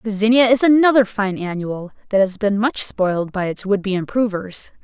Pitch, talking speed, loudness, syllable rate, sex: 210 Hz, 200 wpm, -18 LUFS, 4.9 syllables/s, female